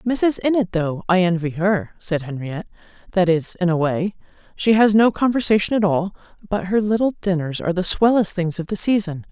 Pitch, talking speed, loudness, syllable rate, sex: 190 Hz, 185 wpm, -19 LUFS, 5.5 syllables/s, female